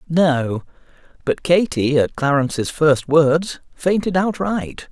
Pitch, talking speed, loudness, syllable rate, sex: 155 Hz, 110 wpm, -18 LUFS, 3.5 syllables/s, male